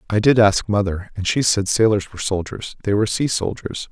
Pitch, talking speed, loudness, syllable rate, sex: 105 Hz, 215 wpm, -19 LUFS, 5.6 syllables/s, male